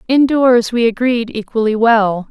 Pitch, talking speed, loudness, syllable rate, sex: 230 Hz, 130 wpm, -14 LUFS, 4.2 syllables/s, female